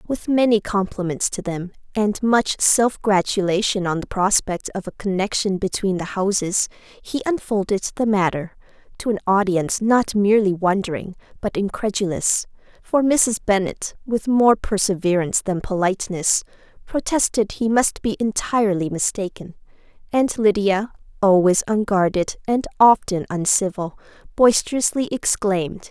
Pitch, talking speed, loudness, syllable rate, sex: 205 Hz, 120 wpm, -20 LUFS, 4.6 syllables/s, female